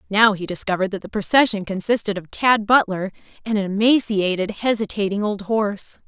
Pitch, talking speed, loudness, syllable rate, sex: 205 Hz, 160 wpm, -20 LUFS, 5.6 syllables/s, female